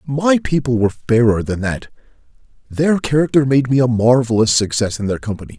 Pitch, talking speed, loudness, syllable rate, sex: 125 Hz, 160 wpm, -16 LUFS, 5.6 syllables/s, male